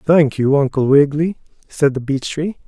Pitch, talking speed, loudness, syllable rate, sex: 145 Hz, 180 wpm, -16 LUFS, 4.9 syllables/s, male